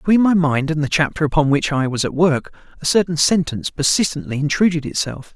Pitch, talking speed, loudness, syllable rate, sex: 155 Hz, 200 wpm, -18 LUFS, 6.1 syllables/s, male